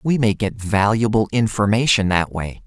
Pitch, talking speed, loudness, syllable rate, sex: 105 Hz, 155 wpm, -18 LUFS, 4.7 syllables/s, male